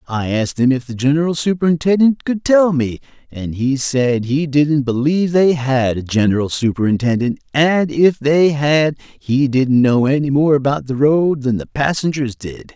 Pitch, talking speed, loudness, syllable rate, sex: 140 Hz, 175 wpm, -16 LUFS, 4.7 syllables/s, male